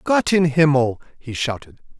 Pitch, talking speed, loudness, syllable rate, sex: 145 Hz, 150 wpm, -18 LUFS, 4.5 syllables/s, male